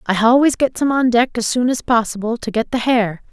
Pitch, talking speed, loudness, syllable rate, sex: 235 Hz, 255 wpm, -17 LUFS, 5.5 syllables/s, female